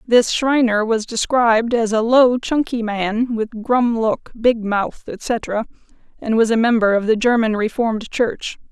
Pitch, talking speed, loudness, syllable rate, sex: 230 Hz, 165 wpm, -18 LUFS, 4.1 syllables/s, female